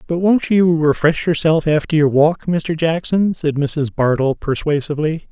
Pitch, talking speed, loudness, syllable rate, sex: 155 Hz, 160 wpm, -16 LUFS, 4.6 syllables/s, male